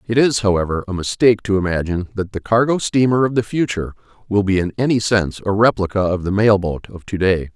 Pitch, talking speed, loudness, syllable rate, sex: 105 Hz, 220 wpm, -18 LUFS, 6.3 syllables/s, male